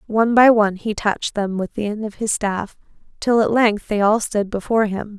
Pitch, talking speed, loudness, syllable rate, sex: 210 Hz, 230 wpm, -19 LUFS, 5.4 syllables/s, female